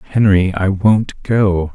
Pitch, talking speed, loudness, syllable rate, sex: 100 Hz, 135 wpm, -15 LUFS, 3.1 syllables/s, male